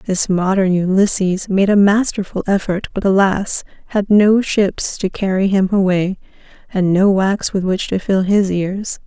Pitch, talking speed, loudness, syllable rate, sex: 195 Hz, 165 wpm, -16 LUFS, 4.3 syllables/s, female